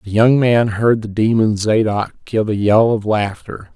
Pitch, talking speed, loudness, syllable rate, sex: 110 Hz, 190 wpm, -16 LUFS, 4.2 syllables/s, male